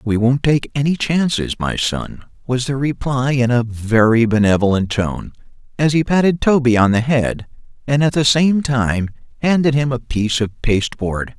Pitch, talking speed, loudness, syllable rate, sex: 125 Hz, 175 wpm, -17 LUFS, 4.7 syllables/s, male